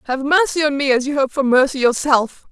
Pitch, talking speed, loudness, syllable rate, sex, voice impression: 275 Hz, 240 wpm, -16 LUFS, 5.6 syllables/s, female, feminine, adult-like, relaxed, slightly muffled, raspy, slightly calm, friendly, unique, slightly lively, slightly intense, slightly sharp